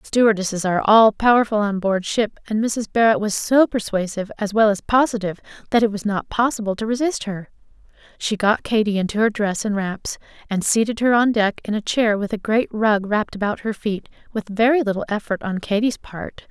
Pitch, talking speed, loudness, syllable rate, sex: 215 Hz, 205 wpm, -20 LUFS, 5.5 syllables/s, female